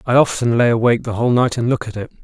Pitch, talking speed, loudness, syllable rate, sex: 120 Hz, 295 wpm, -16 LUFS, 7.5 syllables/s, male